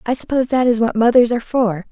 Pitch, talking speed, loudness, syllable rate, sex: 235 Hz, 250 wpm, -16 LUFS, 6.7 syllables/s, female